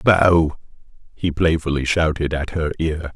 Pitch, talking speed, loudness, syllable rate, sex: 80 Hz, 135 wpm, -20 LUFS, 4.2 syllables/s, male